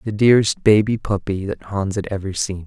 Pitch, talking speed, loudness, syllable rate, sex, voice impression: 100 Hz, 205 wpm, -19 LUFS, 5.5 syllables/s, male, very masculine, very adult-like, slightly thick, tensed, slightly powerful, bright, slightly soft, very clear, very fluent, cool, intellectual, very refreshing, sincere, calm, slightly mature, very friendly, very reassuring, slightly unique, elegant, slightly wild, sweet, lively, kind, slightly modest